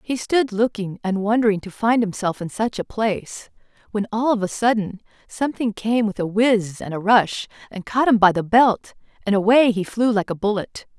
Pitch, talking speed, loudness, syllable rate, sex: 215 Hz, 210 wpm, -20 LUFS, 5.1 syllables/s, female